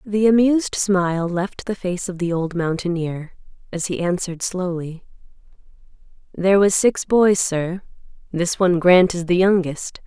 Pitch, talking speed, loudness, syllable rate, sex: 180 Hz, 150 wpm, -19 LUFS, 4.6 syllables/s, female